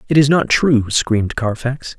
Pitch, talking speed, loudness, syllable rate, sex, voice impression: 130 Hz, 180 wpm, -16 LUFS, 4.4 syllables/s, male, very masculine, very adult-like, very middle-aged, relaxed, slightly weak, slightly dark, very soft, slightly muffled, fluent, cool, very intellectual, sincere, calm, mature, very friendly, very reassuring, unique, very elegant, slightly wild, sweet, slightly lively, very kind, modest